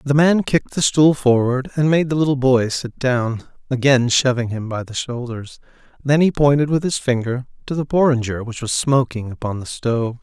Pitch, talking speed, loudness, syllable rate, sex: 130 Hz, 200 wpm, -18 LUFS, 5.1 syllables/s, male